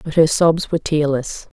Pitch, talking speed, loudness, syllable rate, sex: 160 Hz, 190 wpm, -17 LUFS, 5.0 syllables/s, female